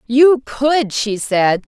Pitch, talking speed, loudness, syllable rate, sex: 240 Hz, 135 wpm, -15 LUFS, 2.6 syllables/s, female